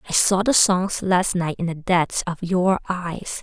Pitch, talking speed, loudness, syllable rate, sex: 180 Hz, 210 wpm, -20 LUFS, 3.9 syllables/s, female